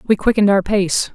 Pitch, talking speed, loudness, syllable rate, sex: 200 Hz, 210 wpm, -16 LUFS, 5.7 syllables/s, female